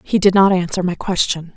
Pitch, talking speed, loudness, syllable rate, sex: 185 Hz, 230 wpm, -16 LUFS, 5.5 syllables/s, female